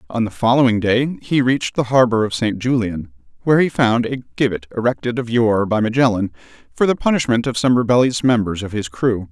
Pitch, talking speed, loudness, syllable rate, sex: 120 Hz, 200 wpm, -18 LUFS, 5.6 syllables/s, male